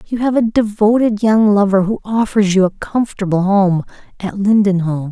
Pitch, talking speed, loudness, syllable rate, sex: 205 Hz, 165 wpm, -14 LUFS, 5.0 syllables/s, female